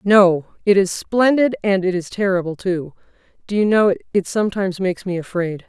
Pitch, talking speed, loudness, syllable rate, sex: 190 Hz, 180 wpm, -18 LUFS, 5.4 syllables/s, female